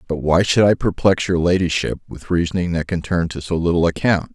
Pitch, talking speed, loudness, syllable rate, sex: 85 Hz, 220 wpm, -18 LUFS, 5.6 syllables/s, male